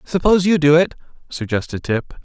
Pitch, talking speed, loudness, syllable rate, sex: 155 Hz, 160 wpm, -17 LUFS, 5.8 syllables/s, male